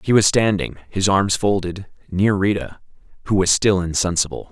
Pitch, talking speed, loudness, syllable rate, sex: 95 Hz, 160 wpm, -19 LUFS, 5.0 syllables/s, male